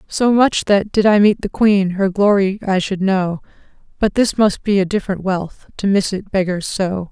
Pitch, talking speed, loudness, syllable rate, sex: 195 Hz, 210 wpm, -16 LUFS, 4.7 syllables/s, female